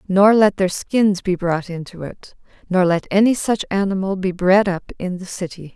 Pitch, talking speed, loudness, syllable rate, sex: 190 Hz, 200 wpm, -18 LUFS, 4.6 syllables/s, female